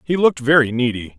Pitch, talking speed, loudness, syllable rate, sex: 130 Hz, 205 wpm, -17 LUFS, 6.5 syllables/s, male